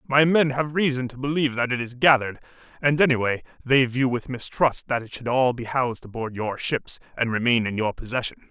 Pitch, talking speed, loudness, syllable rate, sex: 125 Hz, 210 wpm, -23 LUFS, 5.7 syllables/s, male